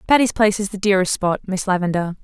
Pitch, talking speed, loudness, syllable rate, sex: 195 Hz, 215 wpm, -19 LUFS, 7.1 syllables/s, female